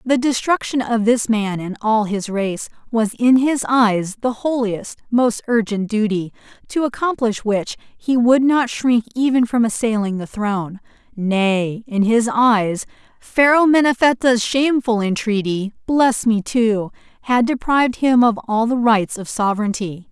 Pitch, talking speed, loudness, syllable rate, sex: 230 Hz, 145 wpm, -18 LUFS, 4.2 syllables/s, female